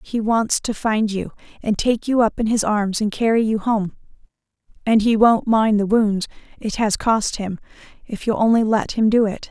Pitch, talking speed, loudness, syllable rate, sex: 215 Hz, 210 wpm, -19 LUFS, 4.7 syllables/s, female